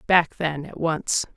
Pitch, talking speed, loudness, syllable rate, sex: 160 Hz, 175 wpm, -24 LUFS, 3.5 syllables/s, female